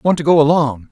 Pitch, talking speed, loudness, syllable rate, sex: 150 Hz, 265 wpm, -14 LUFS, 5.8 syllables/s, male